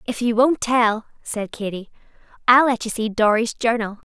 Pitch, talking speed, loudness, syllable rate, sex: 230 Hz, 175 wpm, -20 LUFS, 4.8 syllables/s, female